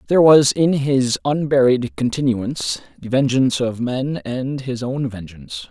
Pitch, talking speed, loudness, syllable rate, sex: 130 Hz, 145 wpm, -18 LUFS, 4.6 syllables/s, male